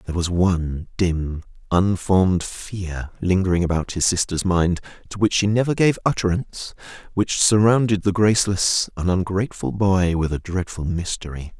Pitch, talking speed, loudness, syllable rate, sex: 95 Hz, 145 wpm, -21 LUFS, 4.9 syllables/s, male